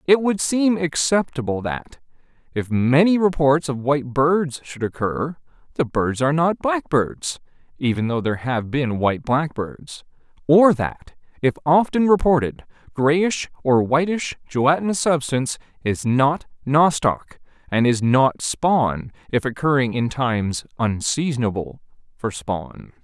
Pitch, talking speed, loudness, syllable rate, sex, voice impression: 140 Hz, 130 wpm, -20 LUFS, 4.3 syllables/s, male, very masculine, very adult-like, middle-aged, thick, very tensed, very powerful, very bright, slightly soft, very clear, very fluent, very cool, intellectual, refreshing, very sincere, very calm, mature, very friendly, very reassuring, very unique, slightly elegant, very wild, sweet, very lively, slightly kind, intense